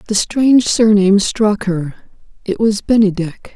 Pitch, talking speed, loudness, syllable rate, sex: 205 Hz, 135 wpm, -14 LUFS, 4.9 syllables/s, female